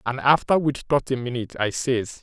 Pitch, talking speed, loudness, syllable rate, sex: 125 Hz, 215 wpm, -23 LUFS, 5.2 syllables/s, male